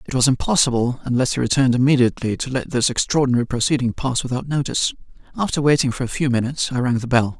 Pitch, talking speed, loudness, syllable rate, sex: 130 Hz, 205 wpm, -19 LUFS, 7.1 syllables/s, male